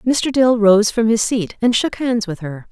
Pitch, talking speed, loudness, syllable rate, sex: 225 Hz, 245 wpm, -16 LUFS, 4.2 syllables/s, female